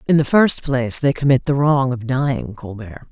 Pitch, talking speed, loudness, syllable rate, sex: 130 Hz, 210 wpm, -17 LUFS, 5.1 syllables/s, female